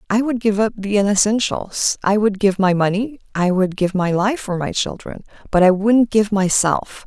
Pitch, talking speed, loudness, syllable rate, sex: 200 Hz, 205 wpm, -18 LUFS, 4.9 syllables/s, female